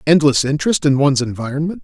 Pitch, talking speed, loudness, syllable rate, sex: 145 Hz, 165 wpm, -16 LUFS, 7.0 syllables/s, male